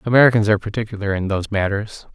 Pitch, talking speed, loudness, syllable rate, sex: 105 Hz, 170 wpm, -19 LUFS, 7.5 syllables/s, male